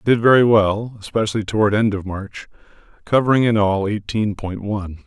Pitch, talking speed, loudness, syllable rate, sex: 105 Hz, 165 wpm, -18 LUFS, 5.4 syllables/s, male